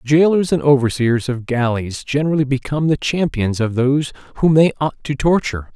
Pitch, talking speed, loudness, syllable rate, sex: 135 Hz, 165 wpm, -17 LUFS, 5.5 syllables/s, male